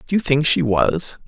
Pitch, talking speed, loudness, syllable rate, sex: 145 Hz, 235 wpm, -18 LUFS, 4.6 syllables/s, male